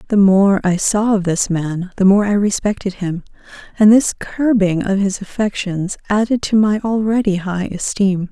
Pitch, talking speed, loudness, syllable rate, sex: 200 Hz, 175 wpm, -16 LUFS, 4.6 syllables/s, female